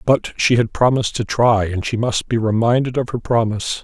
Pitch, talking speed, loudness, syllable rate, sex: 115 Hz, 220 wpm, -18 LUFS, 5.4 syllables/s, male